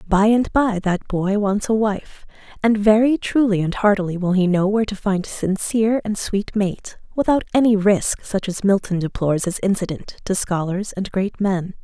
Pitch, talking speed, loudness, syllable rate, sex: 200 Hz, 195 wpm, -19 LUFS, 4.9 syllables/s, female